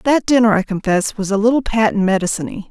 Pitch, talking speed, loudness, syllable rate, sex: 210 Hz, 200 wpm, -16 LUFS, 6.3 syllables/s, female